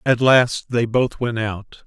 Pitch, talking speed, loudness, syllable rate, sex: 120 Hz, 195 wpm, -19 LUFS, 3.4 syllables/s, male